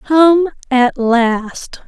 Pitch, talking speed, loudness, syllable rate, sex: 265 Hz, 95 wpm, -13 LUFS, 1.8 syllables/s, female